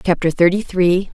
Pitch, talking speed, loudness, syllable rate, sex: 175 Hz, 150 wpm, -16 LUFS, 4.9 syllables/s, female